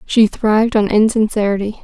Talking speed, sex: 130 wpm, female